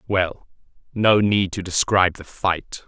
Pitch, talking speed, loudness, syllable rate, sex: 95 Hz, 145 wpm, -20 LUFS, 4.0 syllables/s, male